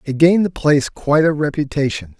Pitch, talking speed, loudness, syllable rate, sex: 150 Hz, 190 wpm, -16 LUFS, 6.2 syllables/s, male